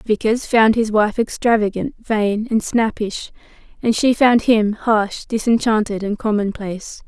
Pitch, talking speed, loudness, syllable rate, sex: 220 Hz, 135 wpm, -18 LUFS, 4.2 syllables/s, female